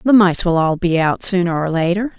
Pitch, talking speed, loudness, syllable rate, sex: 180 Hz, 245 wpm, -16 LUFS, 5.4 syllables/s, female